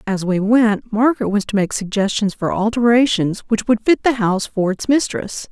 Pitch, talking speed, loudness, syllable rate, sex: 215 Hz, 195 wpm, -17 LUFS, 5.1 syllables/s, female